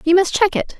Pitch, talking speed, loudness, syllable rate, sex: 370 Hz, 300 wpm, -16 LUFS, 5.8 syllables/s, female